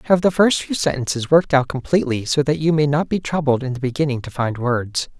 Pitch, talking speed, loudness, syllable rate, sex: 145 Hz, 240 wpm, -19 LUFS, 6.1 syllables/s, male